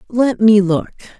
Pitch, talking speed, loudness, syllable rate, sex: 210 Hz, 150 wpm, -14 LUFS, 4.0 syllables/s, female